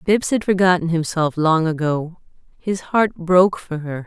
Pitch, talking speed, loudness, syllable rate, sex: 170 Hz, 160 wpm, -19 LUFS, 4.5 syllables/s, female